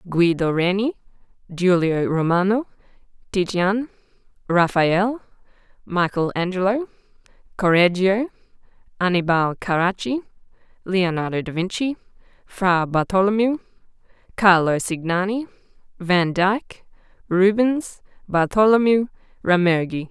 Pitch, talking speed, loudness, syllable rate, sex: 190 Hz, 65 wpm, -20 LUFS, 4.3 syllables/s, female